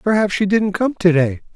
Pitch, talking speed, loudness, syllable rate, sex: 190 Hz, 195 wpm, -17 LUFS, 5.2 syllables/s, male